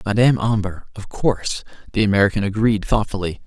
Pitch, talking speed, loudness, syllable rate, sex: 105 Hz, 120 wpm, -20 LUFS, 6.2 syllables/s, male